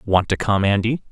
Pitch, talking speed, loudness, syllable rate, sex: 105 Hz, 215 wpm, -19 LUFS, 5.0 syllables/s, male